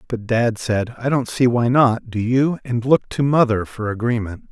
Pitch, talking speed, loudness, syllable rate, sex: 120 Hz, 215 wpm, -19 LUFS, 4.8 syllables/s, male